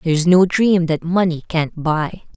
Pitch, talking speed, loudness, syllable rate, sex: 170 Hz, 205 wpm, -17 LUFS, 5.2 syllables/s, female